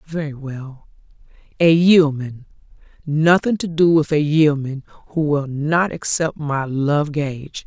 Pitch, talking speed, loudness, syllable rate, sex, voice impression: 150 Hz, 125 wpm, -18 LUFS, 3.7 syllables/s, female, feminine, adult-like, slightly thick, tensed, powerful, clear, intellectual, calm, reassuring, elegant, lively, slightly strict, slightly sharp